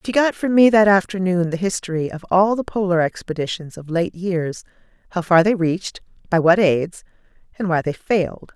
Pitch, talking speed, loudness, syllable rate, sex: 185 Hz, 190 wpm, -19 LUFS, 5.2 syllables/s, female